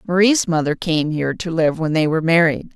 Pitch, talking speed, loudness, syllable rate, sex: 165 Hz, 220 wpm, -18 LUFS, 5.8 syllables/s, female